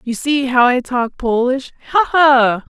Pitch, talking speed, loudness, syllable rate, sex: 260 Hz, 175 wpm, -15 LUFS, 3.8 syllables/s, female